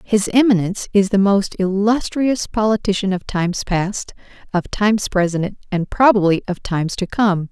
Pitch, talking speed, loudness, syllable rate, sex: 200 Hz, 150 wpm, -18 LUFS, 4.9 syllables/s, female